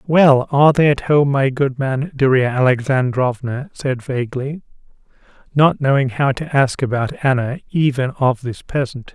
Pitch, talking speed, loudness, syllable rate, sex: 135 Hz, 150 wpm, -17 LUFS, 4.6 syllables/s, male